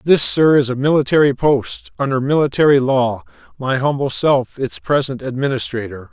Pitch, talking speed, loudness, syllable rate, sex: 135 Hz, 125 wpm, -16 LUFS, 5.0 syllables/s, male